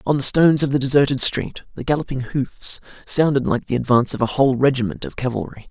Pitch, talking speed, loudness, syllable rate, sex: 135 Hz, 210 wpm, -19 LUFS, 6.3 syllables/s, male